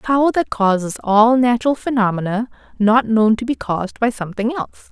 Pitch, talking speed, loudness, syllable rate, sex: 230 Hz, 185 wpm, -17 LUFS, 5.9 syllables/s, female